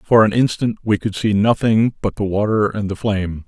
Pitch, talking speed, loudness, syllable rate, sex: 105 Hz, 225 wpm, -18 LUFS, 5.2 syllables/s, male